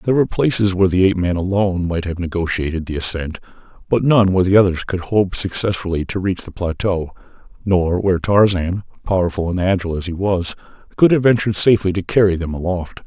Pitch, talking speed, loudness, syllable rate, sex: 95 Hz, 195 wpm, -18 LUFS, 6.3 syllables/s, male